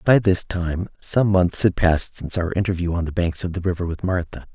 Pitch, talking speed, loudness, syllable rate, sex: 90 Hz, 235 wpm, -21 LUFS, 5.6 syllables/s, male